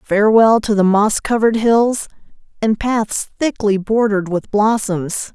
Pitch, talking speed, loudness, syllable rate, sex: 215 Hz, 135 wpm, -16 LUFS, 4.4 syllables/s, female